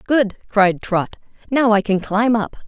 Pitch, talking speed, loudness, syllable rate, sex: 215 Hz, 180 wpm, -18 LUFS, 4.2 syllables/s, female